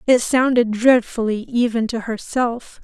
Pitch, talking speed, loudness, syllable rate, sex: 235 Hz, 125 wpm, -18 LUFS, 4.1 syllables/s, female